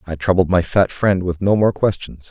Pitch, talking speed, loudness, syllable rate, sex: 90 Hz, 235 wpm, -17 LUFS, 5.0 syllables/s, male